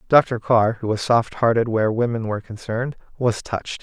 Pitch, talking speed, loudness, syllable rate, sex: 115 Hz, 190 wpm, -21 LUFS, 5.5 syllables/s, male